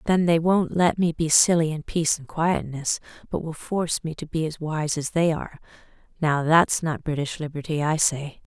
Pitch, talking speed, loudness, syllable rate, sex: 160 Hz, 210 wpm, -23 LUFS, 5.2 syllables/s, female